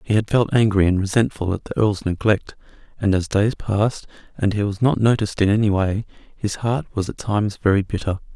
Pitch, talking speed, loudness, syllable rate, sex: 105 Hz, 210 wpm, -20 LUFS, 5.7 syllables/s, male